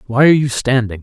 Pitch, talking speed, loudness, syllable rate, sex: 125 Hz, 235 wpm, -14 LUFS, 6.9 syllables/s, male